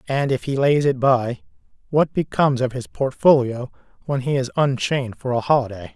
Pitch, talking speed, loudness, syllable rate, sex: 130 Hz, 180 wpm, -20 LUFS, 5.3 syllables/s, male